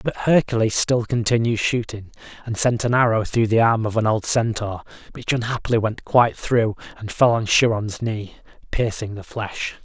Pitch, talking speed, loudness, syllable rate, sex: 115 Hz, 175 wpm, -20 LUFS, 4.9 syllables/s, male